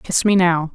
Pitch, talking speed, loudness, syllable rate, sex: 175 Hz, 245 wpm, -16 LUFS, 4.3 syllables/s, female